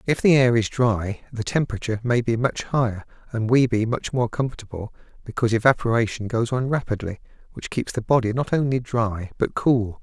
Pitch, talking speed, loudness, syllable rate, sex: 115 Hz, 185 wpm, -22 LUFS, 5.6 syllables/s, male